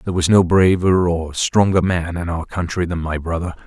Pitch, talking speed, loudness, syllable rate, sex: 85 Hz, 215 wpm, -18 LUFS, 5.1 syllables/s, male